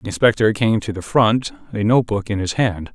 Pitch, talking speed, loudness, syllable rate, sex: 110 Hz, 225 wpm, -18 LUFS, 5.6 syllables/s, male